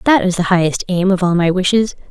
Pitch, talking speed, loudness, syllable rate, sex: 185 Hz, 255 wpm, -15 LUFS, 6.0 syllables/s, female